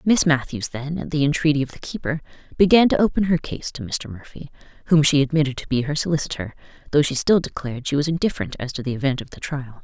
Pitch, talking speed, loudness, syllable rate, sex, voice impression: 145 Hz, 230 wpm, -21 LUFS, 6.5 syllables/s, female, very feminine, very adult-like, slightly old, slightly thin, slightly tensed, slightly weak, slightly bright, hard, very clear, very fluent, slightly raspy, slightly cool, intellectual, very refreshing, very sincere, calm, friendly, reassuring, unique, very elegant, wild, slightly sweet, lively, kind